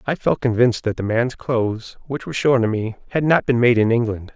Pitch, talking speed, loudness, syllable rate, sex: 120 Hz, 250 wpm, -19 LUFS, 5.8 syllables/s, male